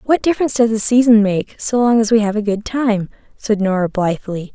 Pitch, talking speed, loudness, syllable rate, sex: 215 Hz, 225 wpm, -16 LUFS, 5.8 syllables/s, female